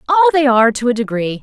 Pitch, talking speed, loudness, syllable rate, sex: 255 Hz, 255 wpm, -14 LUFS, 6.6 syllables/s, female